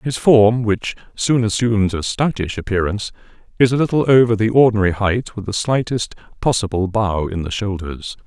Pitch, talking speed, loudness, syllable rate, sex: 110 Hz, 165 wpm, -17 LUFS, 5.3 syllables/s, male